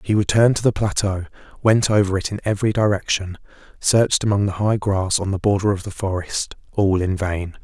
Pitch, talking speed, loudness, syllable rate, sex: 100 Hz, 195 wpm, -20 LUFS, 5.7 syllables/s, male